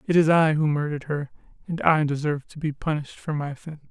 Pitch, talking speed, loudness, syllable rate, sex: 150 Hz, 230 wpm, -24 LUFS, 6.7 syllables/s, male